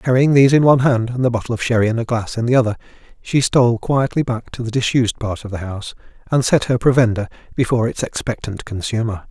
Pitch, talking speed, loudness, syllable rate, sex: 120 Hz, 225 wpm, -17 LUFS, 6.6 syllables/s, male